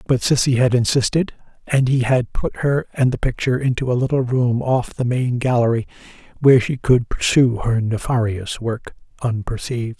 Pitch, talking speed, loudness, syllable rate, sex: 125 Hz, 170 wpm, -19 LUFS, 5.1 syllables/s, male